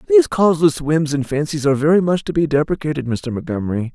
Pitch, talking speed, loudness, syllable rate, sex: 145 Hz, 200 wpm, -18 LUFS, 6.7 syllables/s, male